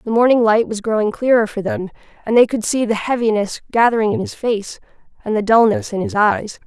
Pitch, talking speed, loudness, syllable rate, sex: 220 Hz, 215 wpm, -17 LUFS, 5.7 syllables/s, female